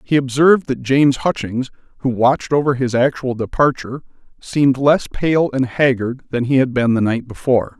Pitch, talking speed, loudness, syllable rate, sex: 130 Hz, 175 wpm, -17 LUFS, 5.4 syllables/s, male